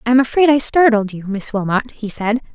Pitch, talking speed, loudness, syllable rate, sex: 230 Hz, 235 wpm, -16 LUFS, 5.9 syllables/s, female